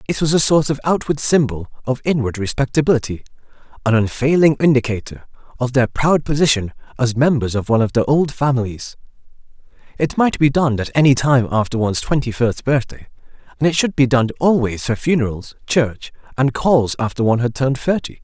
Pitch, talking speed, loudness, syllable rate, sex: 130 Hz, 170 wpm, -17 LUFS, 5.9 syllables/s, male